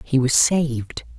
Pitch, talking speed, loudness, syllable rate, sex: 135 Hz, 150 wpm, -19 LUFS, 4.1 syllables/s, female